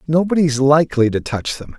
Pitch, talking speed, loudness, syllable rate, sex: 140 Hz, 170 wpm, -16 LUFS, 5.5 syllables/s, male